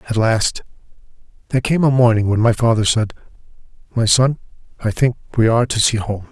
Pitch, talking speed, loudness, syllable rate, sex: 115 Hz, 180 wpm, -17 LUFS, 6.0 syllables/s, male